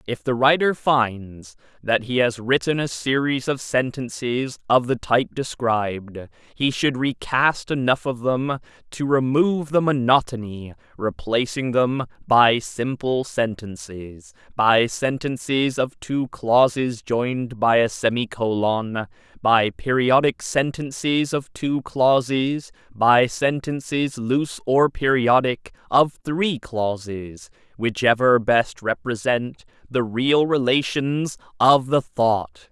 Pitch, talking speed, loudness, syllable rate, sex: 125 Hz, 115 wpm, -21 LUFS, 3.6 syllables/s, male